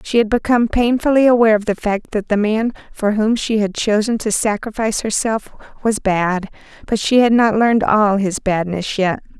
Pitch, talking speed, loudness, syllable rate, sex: 215 Hz, 190 wpm, -17 LUFS, 5.2 syllables/s, female